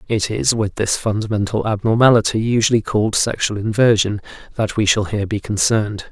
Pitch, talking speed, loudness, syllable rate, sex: 105 Hz, 155 wpm, -17 LUFS, 5.8 syllables/s, male